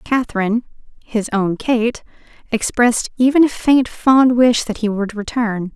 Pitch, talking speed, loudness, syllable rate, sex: 230 Hz, 145 wpm, -16 LUFS, 4.5 syllables/s, female